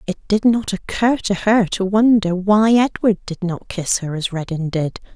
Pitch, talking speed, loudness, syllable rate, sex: 195 Hz, 200 wpm, -18 LUFS, 4.3 syllables/s, female